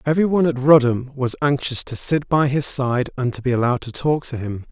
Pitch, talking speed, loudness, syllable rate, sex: 135 Hz, 230 wpm, -19 LUFS, 5.7 syllables/s, male